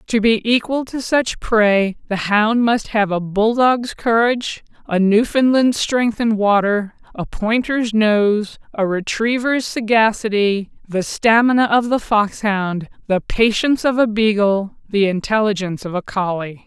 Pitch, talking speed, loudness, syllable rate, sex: 215 Hz, 140 wpm, -17 LUFS, 4.1 syllables/s, female